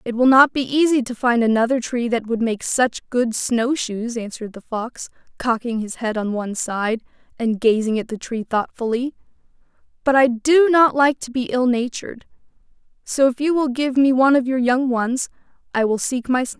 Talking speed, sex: 210 wpm, female